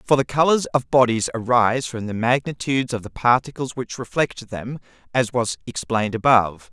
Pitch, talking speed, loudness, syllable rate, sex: 125 Hz, 170 wpm, -21 LUFS, 5.4 syllables/s, male